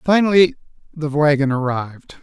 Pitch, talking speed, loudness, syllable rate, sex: 150 Hz, 110 wpm, -17 LUFS, 5.1 syllables/s, male